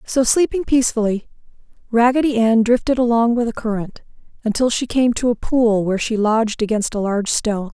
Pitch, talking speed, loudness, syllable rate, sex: 230 Hz, 175 wpm, -18 LUFS, 5.7 syllables/s, female